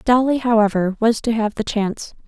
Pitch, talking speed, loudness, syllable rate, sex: 225 Hz, 185 wpm, -18 LUFS, 5.4 syllables/s, female